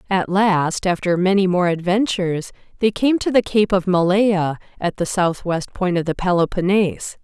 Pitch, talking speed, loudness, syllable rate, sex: 185 Hz, 165 wpm, -19 LUFS, 4.8 syllables/s, female